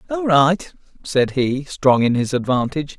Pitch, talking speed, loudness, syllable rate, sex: 145 Hz, 160 wpm, -18 LUFS, 4.4 syllables/s, male